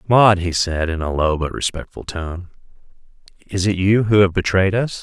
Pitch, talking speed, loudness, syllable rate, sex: 95 Hz, 190 wpm, -18 LUFS, 5.0 syllables/s, male